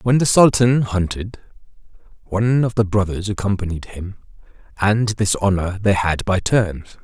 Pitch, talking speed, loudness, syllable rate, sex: 100 Hz, 145 wpm, -18 LUFS, 4.7 syllables/s, male